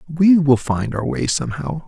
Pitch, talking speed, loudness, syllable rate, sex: 140 Hz, 195 wpm, -18 LUFS, 4.7 syllables/s, male